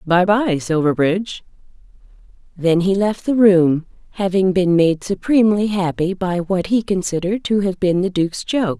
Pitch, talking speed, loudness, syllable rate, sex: 185 Hz, 155 wpm, -17 LUFS, 4.9 syllables/s, female